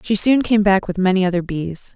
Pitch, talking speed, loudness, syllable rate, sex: 195 Hz, 245 wpm, -17 LUFS, 5.4 syllables/s, female